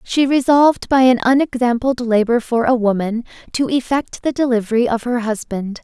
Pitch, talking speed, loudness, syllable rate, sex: 245 Hz, 165 wpm, -16 LUFS, 5.2 syllables/s, female